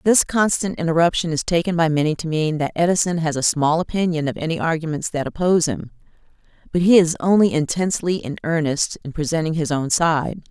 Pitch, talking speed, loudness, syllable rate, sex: 165 Hz, 190 wpm, -19 LUFS, 5.9 syllables/s, female